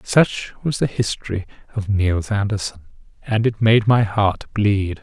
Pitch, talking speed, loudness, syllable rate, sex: 105 Hz, 155 wpm, -20 LUFS, 4.3 syllables/s, male